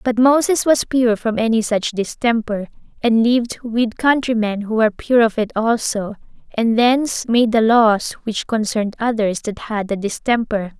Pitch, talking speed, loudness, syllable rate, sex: 225 Hz, 165 wpm, -18 LUFS, 4.7 syllables/s, female